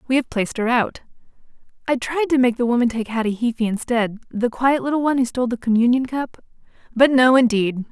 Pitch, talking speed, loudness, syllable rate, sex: 245 Hz, 190 wpm, -19 LUFS, 6.2 syllables/s, female